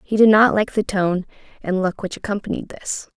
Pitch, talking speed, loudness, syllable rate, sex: 200 Hz, 205 wpm, -20 LUFS, 5.3 syllables/s, female